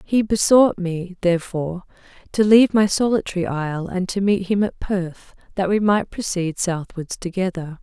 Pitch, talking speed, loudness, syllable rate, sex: 190 Hz, 160 wpm, -20 LUFS, 4.9 syllables/s, female